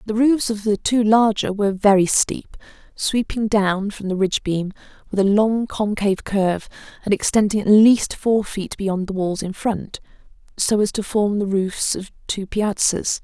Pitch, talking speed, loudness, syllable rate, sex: 205 Hz, 175 wpm, -19 LUFS, 4.5 syllables/s, female